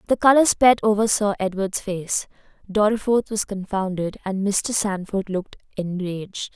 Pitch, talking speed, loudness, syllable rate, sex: 200 Hz, 120 wpm, -22 LUFS, 4.6 syllables/s, female